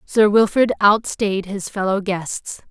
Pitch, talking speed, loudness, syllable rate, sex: 200 Hz, 135 wpm, -18 LUFS, 3.6 syllables/s, female